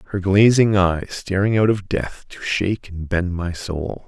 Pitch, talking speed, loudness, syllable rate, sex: 95 Hz, 190 wpm, -19 LUFS, 4.3 syllables/s, male